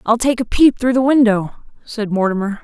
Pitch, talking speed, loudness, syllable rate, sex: 230 Hz, 205 wpm, -15 LUFS, 5.5 syllables/s, female